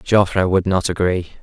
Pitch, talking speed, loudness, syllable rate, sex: 95 Hz, 170 wpm, -18 LUFS, 4.9 syllables/s, male